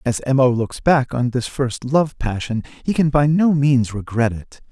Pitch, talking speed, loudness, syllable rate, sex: 130 Hz, 215 wpm, -19 LUFS, 4.4 syllables/s, male